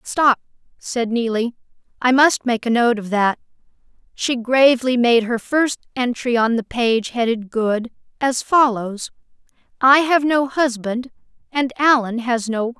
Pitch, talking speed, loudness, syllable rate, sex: 245 Hz, 150 wpm, -18 LUFS, 4.2 syllables/s, female